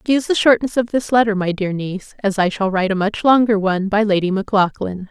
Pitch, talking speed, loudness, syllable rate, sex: 205 Hz, 235 wpm, -17 LUFS, 6.2 syllables/s, female